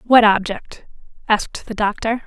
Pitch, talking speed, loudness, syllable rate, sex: 215 Hz, 130 wpm, -18 LUFS, 4.6 syllables/s, female